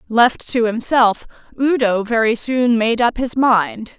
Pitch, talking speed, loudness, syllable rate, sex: 235 Hz, 150 wpm, -16 LUFS, 3.7 syllables/s, female